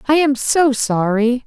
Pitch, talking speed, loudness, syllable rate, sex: 255 Hz, 165 wpm, -16 LUFS, 3.8 syllables/s, female